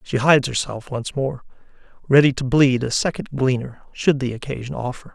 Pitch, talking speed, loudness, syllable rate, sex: 130 Hz, 175 wpm, -20 LUFS, 5.3 syllables/s, male